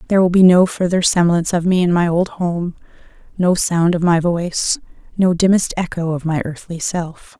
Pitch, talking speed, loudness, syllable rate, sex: 175 Hz, 195 wpm, -16 LUFS, 5.2 syllables/s, female